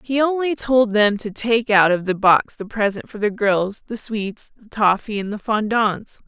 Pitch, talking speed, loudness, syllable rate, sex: 215 Hz, 210 wpm, -19 LUFS, 4.3 syllables/s, female